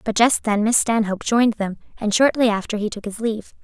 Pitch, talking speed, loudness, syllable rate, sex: 220 Hz, 230 wpm, -20 LUFS, 6.1 syllables/s, female